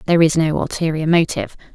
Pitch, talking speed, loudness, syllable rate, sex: 160 Hz, 170 wpm, -17 LUFS, 6.9 syllables/s, female